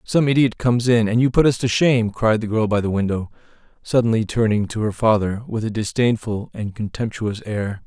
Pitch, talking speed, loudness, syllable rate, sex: 110 Hz, 205 wpm, -20 LUFS, 5.5 syllables/s, male